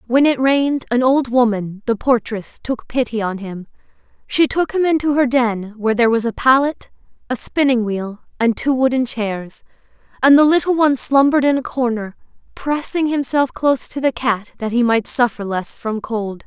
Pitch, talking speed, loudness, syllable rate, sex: 245 Hz, 185 wpm, -17 LUFS, 5.0 syllables/s, female